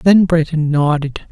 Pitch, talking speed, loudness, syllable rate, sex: 160 Hz, 135 wpm, -15 LUFS, 3.9 syllables/s, male